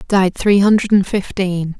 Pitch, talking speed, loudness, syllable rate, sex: 195 Hz, 135 wpm, -15 LUFS, 4.3 syllables/s, female